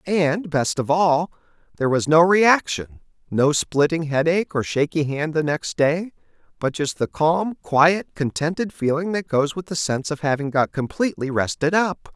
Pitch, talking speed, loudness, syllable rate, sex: 160 Hz, 175 wpm, -21 LUFS, 4.6 syllables/s, male